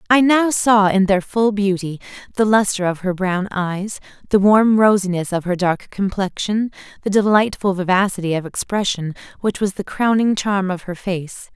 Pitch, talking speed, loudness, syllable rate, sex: 195 Hz, 170 wpm, -18 LUFS, 4.7 syllables/s, female